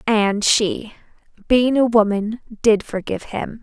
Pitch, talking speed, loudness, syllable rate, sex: 220 Hz, 130 wpm, -18 LUFS, 3.8 syllables/s, female